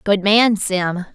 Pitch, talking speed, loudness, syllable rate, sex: 200 Hz, 155 wpm, -16 LUFS, 3.0 syllables/s, female